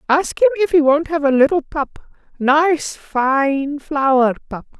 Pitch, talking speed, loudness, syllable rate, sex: 290 Hz, 150 wpm, -17 LUFS, 3.6 syllables/s, female